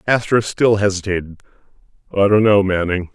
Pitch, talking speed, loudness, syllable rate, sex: 100 Hz, 135 wpm, -16 LUFS, 5.3 syllables/s, male